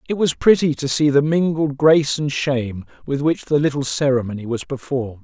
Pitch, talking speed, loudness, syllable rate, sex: 140 Hz, 195 wpm, -19 LUFS, 5.6 syllables/s, male